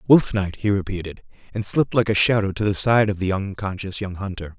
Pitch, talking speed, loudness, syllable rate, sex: 100 Hz, 220 wpm, -21 LUFS, 5.8 syllables/s, male